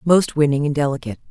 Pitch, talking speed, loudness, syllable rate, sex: 145 Hz, 185 wpm, -19 LUFS, 7.1 syllables/s, female